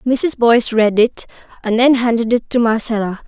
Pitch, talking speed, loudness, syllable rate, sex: 230 Hz, 185 wpm, -14 LUFS, 5.2 syllables/s, female